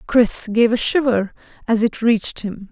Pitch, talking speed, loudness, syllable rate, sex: 225 Hz, 175 wpm, -18 LUFS, 4.5 syllables/s, female